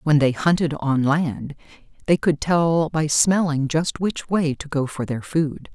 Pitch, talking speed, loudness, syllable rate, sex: 150 Hz, 190 wpm, -21 LUFS, 3.9 syllables/s, female